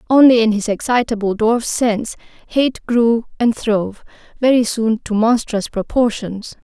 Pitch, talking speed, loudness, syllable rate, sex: 225 Hz, 135 wpm, -16 LUFS, 4.4 syllables/s, female